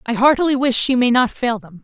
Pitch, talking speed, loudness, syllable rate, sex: 250 Hz, 260 wpm, -16 LUFS, 5.9 syllables/s, female